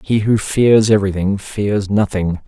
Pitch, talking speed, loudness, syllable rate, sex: 100 Hz, 145 wpm, -16 LUFS, 4.3 syllables/s, male